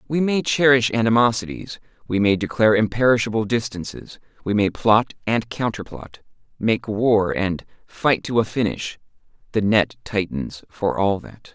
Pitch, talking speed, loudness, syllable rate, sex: 110 Hz, 145 wpm, -20 LUFS, 4.6 syllables/s, male